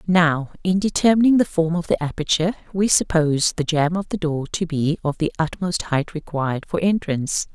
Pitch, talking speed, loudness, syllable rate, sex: 165 Hz, 190 wpm, -21 LUFS, 5.3 syllables/s, female